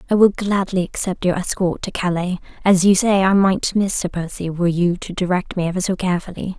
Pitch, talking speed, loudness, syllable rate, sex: 185 Hz, 220 wpm, -19 LUFS, 5.7 syllables/s, female